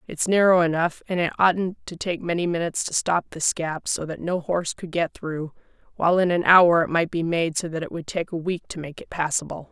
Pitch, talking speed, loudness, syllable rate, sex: 170 Hz, 245 wpm, -23 LUFS, 5.6 syllables/s, female